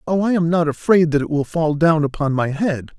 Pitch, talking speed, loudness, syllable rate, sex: 160 Hz, 260 wpm, -18 LUFS, 5.4 syllables/s, male